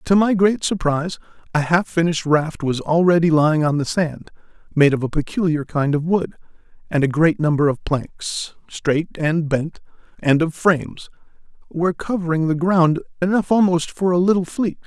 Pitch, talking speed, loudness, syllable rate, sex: 165 Hz, 175 wpm, -19 LUFS, 5.0 syllables/s, male